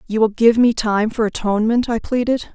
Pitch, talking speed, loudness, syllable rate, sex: 225 Hz, 210 wpm, -17 LUFS, 5.4 syllables/s, female